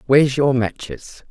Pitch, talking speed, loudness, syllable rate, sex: 125 Hz, 140 wpm, -17 LUFS, 4.6 syllables/s, female